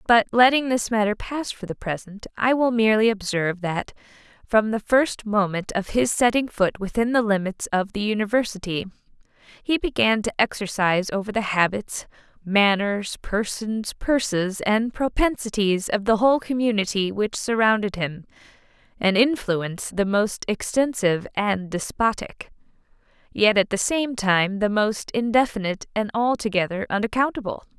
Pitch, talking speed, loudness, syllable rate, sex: 215 Hz, 140 wpm, -22 LUFS, 4.9 syllables/s, female